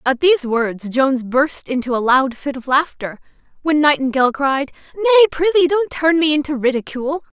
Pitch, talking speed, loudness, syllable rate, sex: 285 Hz, 160 wpm, -17 LUFS, 5.3 syllables/s, female